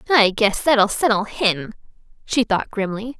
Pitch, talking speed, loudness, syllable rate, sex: 220 Hz, 150 wpm, -19 LUFS, 4.1 syllables/s, female